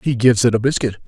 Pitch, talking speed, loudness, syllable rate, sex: 120 Hz, 280 wpm, -16 LUFS, 6.8 syllables/s, male